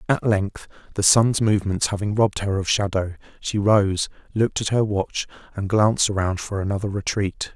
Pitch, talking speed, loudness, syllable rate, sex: 100 Hz, 175 wpm, -22 LUFS, 5.2 syllables/s, male